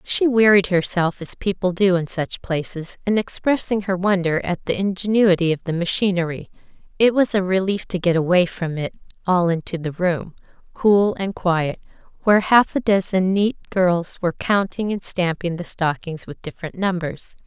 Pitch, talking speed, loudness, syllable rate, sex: 185 Hz, 170 wpm, -20 LUFS, 4.9 syllables/s, female